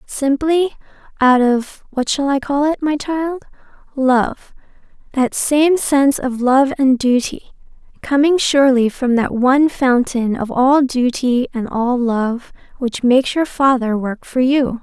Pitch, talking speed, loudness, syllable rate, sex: 265 Hz, 140 wpm, -16 LUFS, 4.1 syllables/s, female